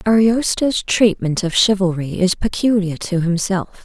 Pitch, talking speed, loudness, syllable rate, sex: 190 Hz, 125 wpm, -17 LUFS, 4.3 syllables/s, female